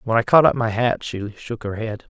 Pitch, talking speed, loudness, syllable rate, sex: 110 Hz, 280 wpm, -20 LUFS, 5.1 syllables/s, male